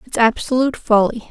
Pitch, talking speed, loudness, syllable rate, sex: 235 Hz, 140 wpm, -17 LUFS, 6.3 syllables/s, female